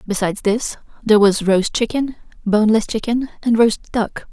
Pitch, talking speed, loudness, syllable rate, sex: 220 Hz, 155 wpm, -17 LUFS, 5.2 syllables/s, female